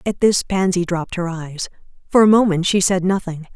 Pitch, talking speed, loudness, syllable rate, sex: 180 Hz, 205 wpm, -17 LUFS, 5.3 syllables/s, female